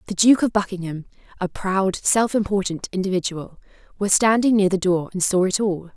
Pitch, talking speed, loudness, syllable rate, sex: 195 Hz, 180 wpm, -20 LUFS, 5.3 syllables/s, female